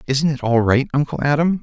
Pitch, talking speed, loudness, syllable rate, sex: 140 Hz, 220 wpm, -18 LUFS, 5.7 syllables/s, male